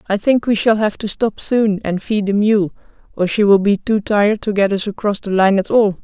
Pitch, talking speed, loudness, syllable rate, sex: 205 Hz, 260 wpm, -16 LUFS, 5.1 syllables/s, female